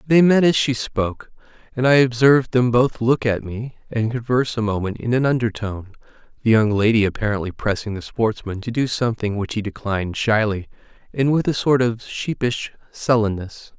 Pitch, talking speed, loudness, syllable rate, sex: 115 Hz, 185 wpm, -20 LUFS, 5.3 syllables/s, male